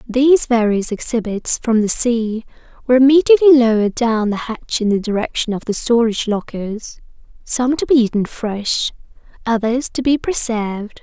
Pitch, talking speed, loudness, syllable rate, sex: 235 Hz, 150 wpm, -16 LUFS, 5.1 syllables/s, female